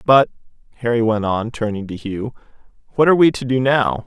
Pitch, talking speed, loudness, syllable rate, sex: 115 Hz, 190 wpm, -18 LUFS, 5.8 syllables/s, male